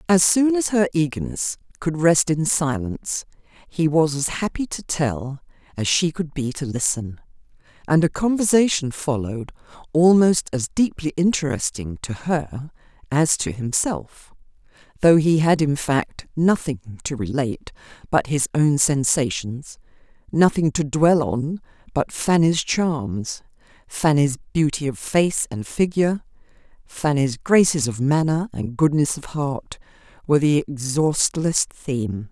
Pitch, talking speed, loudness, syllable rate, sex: 150 Hz, 130 wpm, -21 LUFS, 4.2 syllables/s, female